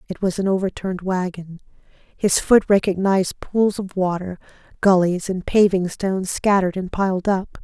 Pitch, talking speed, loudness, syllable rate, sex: 190 Hz, 150 wpm, -20 LUFS, 5.0 syllables/s, female